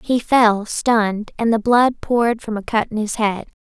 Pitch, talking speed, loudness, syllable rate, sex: 225 Hz, 215 wpm, -18 LUFS, 4.5 syllables/s, female